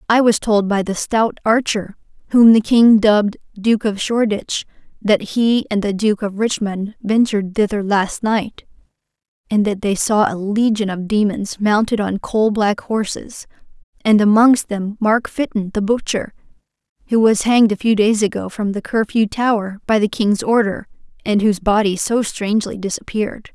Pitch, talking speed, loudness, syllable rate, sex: 210 Hz, 170 wpm, -17 LUFS, 4.7 syllables/s, female